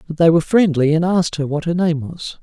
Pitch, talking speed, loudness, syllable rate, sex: 160 Hz, 275 wpm, -17 LUFS, 6.2 syllables/s, male